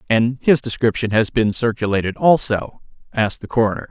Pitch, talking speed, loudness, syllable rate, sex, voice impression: 115 Hz, 155 wpm, -18 LUFS, 5.8 syllables/s, male, masculine, adult-like, slightly fluent, slightly cool, refreshing, sincere